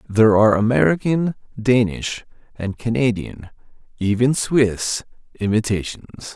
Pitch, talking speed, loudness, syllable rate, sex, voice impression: 115 Hz, 65 wpm, -19 LUFS, 4.6 syllables/s, male, masculine, adult-like, slightly halting, cool, sincere, slightly calm, slightly wild